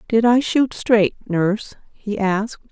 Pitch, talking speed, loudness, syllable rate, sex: 215 Hz, 155 wpm, -19 LUFS, 4.1 syllables/s, female